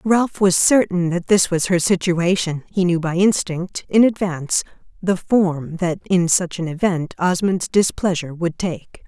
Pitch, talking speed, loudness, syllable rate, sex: 180 Hz, 165 wpm, -19 LUFS, 4.3 syllables/s, female